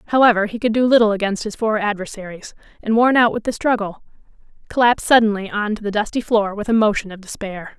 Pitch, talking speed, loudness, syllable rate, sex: 215 Hz, 210 wpm, -18 LUFS, 6.3 syllables/s, female